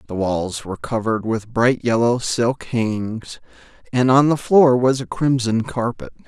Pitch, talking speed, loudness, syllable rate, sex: 120 Hz, 165 wpm, -19 LUFS, 4.4 syllables/s, male